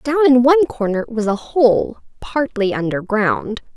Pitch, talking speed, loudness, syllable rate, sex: 240 Hz, 145 wpm, -17 LUFS, 4.2 syllables/s, female